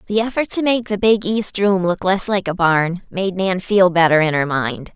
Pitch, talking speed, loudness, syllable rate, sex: 190 Hz, 240 wpm, -17 LUFS, 4.7 syllables/s, female